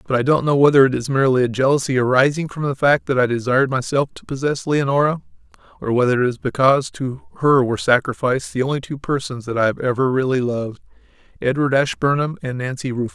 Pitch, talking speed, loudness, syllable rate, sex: 130 Hz, 200 wpm, -19 LUFS, 6.5 syllables/s, male